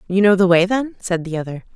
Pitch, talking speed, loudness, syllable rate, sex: 190 Hz, 275 wpm, -17 LUFS, 6.1 syllables/s, female